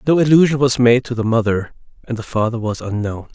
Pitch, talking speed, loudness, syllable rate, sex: 120 Hz, 215 wpm, -17 LUFS, 5.9 syllables/s, male